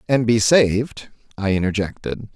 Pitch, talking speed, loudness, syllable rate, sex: 110 Hz, 125 wpm, -19 LUFS, 4.7 syllables/s, male